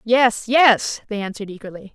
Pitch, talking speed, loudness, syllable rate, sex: 220 Hz, 155 wpm, -18 LUFS, 5.1 syllables/s, female